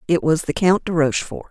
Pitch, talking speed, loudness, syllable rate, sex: 165 Hz, 240 wpm, -19 LUFS, 6.2 syllables/s, female